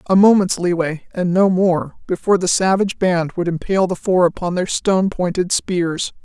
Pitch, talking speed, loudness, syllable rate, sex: 180 Hz, 185 wpm, -17 LUFS, 5.3 syllables/s, female